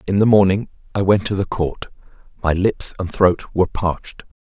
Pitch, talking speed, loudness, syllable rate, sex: 95 Hz, 190 wpm, -19 LUFS, 5.1 syllables/s, male